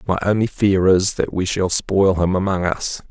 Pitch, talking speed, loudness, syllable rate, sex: 95 Hz, 215 wpm, -18 LUFS, 4.6 syllables/s, male